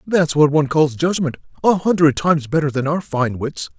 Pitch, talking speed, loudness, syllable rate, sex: 150 Hz, 205 wpm, -18 LUFS, 5.4 syllables/s, male